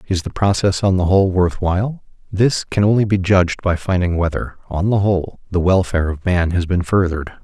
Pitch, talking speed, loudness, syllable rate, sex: 90 Hz, 210 wpm, -17 LUFS, 5.7 syllables/s, male